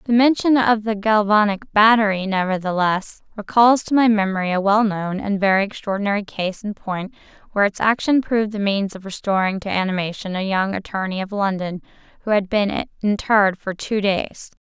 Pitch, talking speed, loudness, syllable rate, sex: 205 Hz, 170 wpm, -19 LUFS, 5.4 syllables/s, female